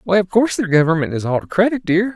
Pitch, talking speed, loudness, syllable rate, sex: 185 Hz, 225 wpm, -17 LUFS, 6.8 syllables/s, male